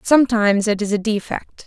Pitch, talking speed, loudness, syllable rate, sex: 215 Hz, 180 wpm, -18 LUFS, 5.7 syllables/s, female